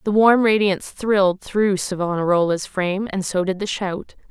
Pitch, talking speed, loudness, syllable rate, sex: 195 Hz, 165 wpm, -20 LUFS, 4.9 syllables/s, female